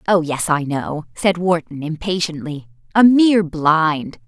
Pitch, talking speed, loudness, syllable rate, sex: 165 Hz, 140 wpm, -17 LUFS, 4.0 syllables/s, female